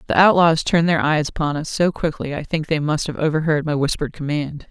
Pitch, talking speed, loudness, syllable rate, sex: 155 Hz, 230 wpm, -19 LUFS, 6.0 syllables/s, female